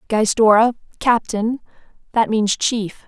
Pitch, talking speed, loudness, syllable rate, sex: 220 Hz, 100 wpm, -18 LUFS, 3.8 syllables/s, female